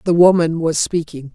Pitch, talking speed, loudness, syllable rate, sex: 165 Hz, 180 wpm, -16 LUFS, 4.9 syllables/s, female